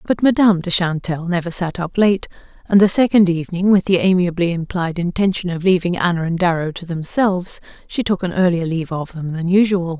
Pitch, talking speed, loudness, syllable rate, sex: 180 Hz, 200 wpm, -17 LUFS, 5.8 syllables/s, female